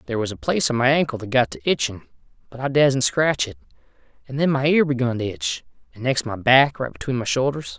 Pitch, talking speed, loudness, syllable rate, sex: 125 Hz, 240 wpm, -21 LUFS, 6.2 syllables/s, male